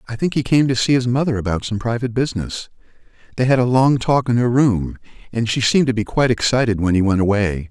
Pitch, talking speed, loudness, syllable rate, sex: 115 Hz, 240 wpm, -18 LUFS, 6.4 syllables/s, male